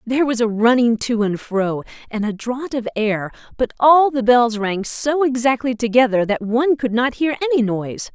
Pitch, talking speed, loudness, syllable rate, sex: 240 Hz, 200 wpm, -18 LUFS, 5.0 syllables/s, female